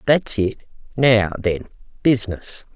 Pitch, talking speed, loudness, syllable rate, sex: 110 Hz, 110 wpm, -20 LUFS, 4.0 syllables/s, female